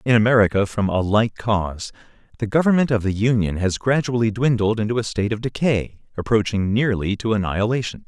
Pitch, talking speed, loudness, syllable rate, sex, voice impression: 110 Hz, 170 wpm, -20 LUFS, 5.8 syllables/s, male, masculine, adult-like, slightly fluent, cool, intellectual, slightly refreshing